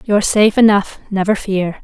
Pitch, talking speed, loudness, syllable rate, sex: 200 Hz, 165 wpm, -14 LUFS, 5.7 syllables/s, female